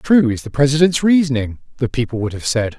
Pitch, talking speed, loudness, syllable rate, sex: 135 Hz, 235 wpm, -17 LUFS, 6.5 syllables/s, male